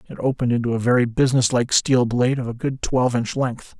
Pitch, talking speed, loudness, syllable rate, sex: 125 Hz, 220 wpm, -20 LUFS, 6.7 syllables/s, male